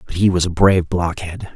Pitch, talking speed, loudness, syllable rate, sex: 90 Hz, 230 wpm, -17 LUFS, 5.7 syllables/s, male